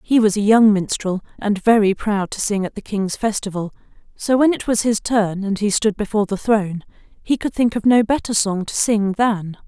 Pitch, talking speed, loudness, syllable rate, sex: 210 Hz, 225 wpm, -18 LUFS, 5.1 syllables/s, female